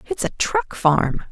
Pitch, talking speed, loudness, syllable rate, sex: 190 Hz, 180 wpm, -20 LUFS, 3.9 syllables/s, female